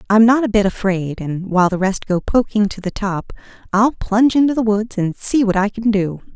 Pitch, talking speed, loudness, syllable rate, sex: 205 Hz, 235 wpm, -17 LUFS, 5.3 syllables/s, female